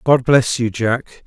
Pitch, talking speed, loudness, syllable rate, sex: 125 Hz, 190 wpm, -17 LUFS, 3.5 syllables/s, male